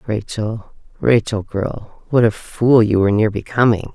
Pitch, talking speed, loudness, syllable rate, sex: 110 Hz, 150 wpm, -17 LUFS, 4.3 syllables/s, female